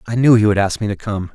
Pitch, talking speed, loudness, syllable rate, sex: 105 Hz, 360 wpm, -16 LUFS, 6.5 syllables/s, male